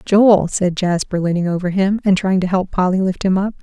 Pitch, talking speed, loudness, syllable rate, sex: 185 Hz, 230 wpm, -16 LUFS, 5.3 syllables/s, female